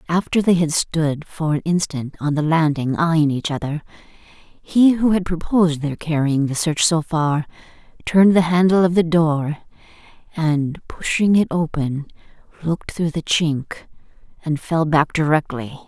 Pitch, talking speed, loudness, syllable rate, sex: 160 Hz, 155 wpm, -19 LUFS, 4.4 syllables/s, female